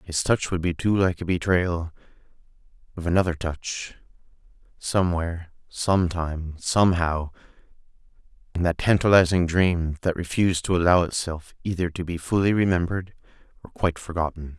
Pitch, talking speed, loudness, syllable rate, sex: 85 Hz, 130 wpm, -24 LUFS, 5.4 syllables/s, male